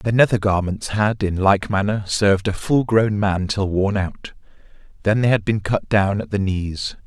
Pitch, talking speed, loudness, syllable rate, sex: 100 Hz, 205 wpm, -19 LUFS, 4.5 syllables/s, male